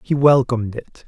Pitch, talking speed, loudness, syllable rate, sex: 125 Hz, 170 wpm, -17 LUFS, 5.2 syllables/s, male